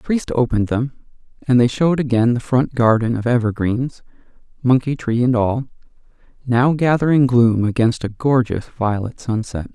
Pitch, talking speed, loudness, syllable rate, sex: 125 Hz, 155 wpm, -18 LUFS, 4.9 syllables/s, male